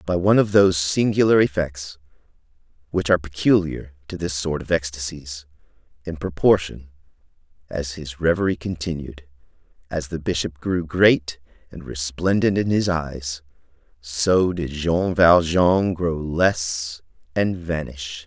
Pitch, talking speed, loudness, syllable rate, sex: 80 Hz, 125 wpm, -21 LUFS, 4.2 syllables/s, male